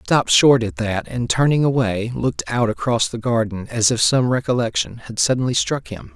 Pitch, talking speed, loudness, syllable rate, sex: 115 Hz, 205 wpm, -19 LUFS, 5.6 syllables/s, male